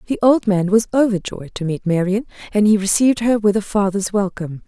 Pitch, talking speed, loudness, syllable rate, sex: 205 Hz, 205 wpm, -17 LUFS, 5.8 syllables/s, female